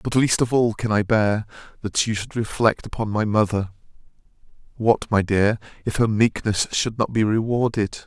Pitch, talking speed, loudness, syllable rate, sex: 110 Hz, 180 wpm, -21 LUFS, 4.8 syllables/s, male